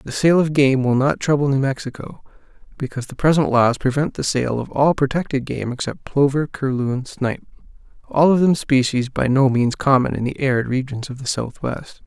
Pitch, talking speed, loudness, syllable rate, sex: 135 Hz, 195 wpm, -19 LUFS, 5.4 syllables/s, male